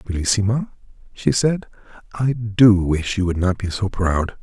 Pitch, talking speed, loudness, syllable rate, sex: 105 Hz, 165 wpm, -19 LUFS, 4.4 syllables/s, male